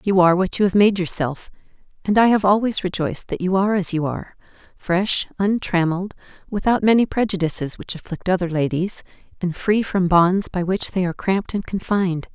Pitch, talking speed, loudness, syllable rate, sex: 190 Hz, 185 wpm, -20 LUFS, 5.7 syllables/s, female